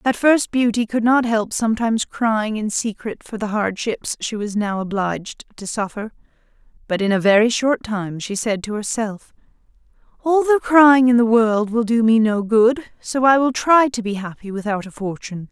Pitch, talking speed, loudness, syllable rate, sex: 225 Hz, 195 wpm, -18 LUFS, 4.8 syllables/s, female